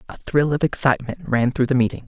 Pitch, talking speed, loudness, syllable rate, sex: 130 Hz, 230 wpm, -20 LUFS, 6.4 syllables/s, male